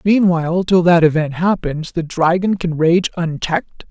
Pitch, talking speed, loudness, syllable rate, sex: 170 Hz, 155 wpm, -16 LUFS, 4.7 syllables/s, female